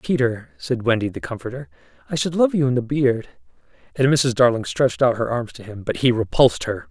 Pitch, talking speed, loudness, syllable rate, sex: 120 Hz, 215 wpm, -20 LUFS, 5.7 syllables/s, male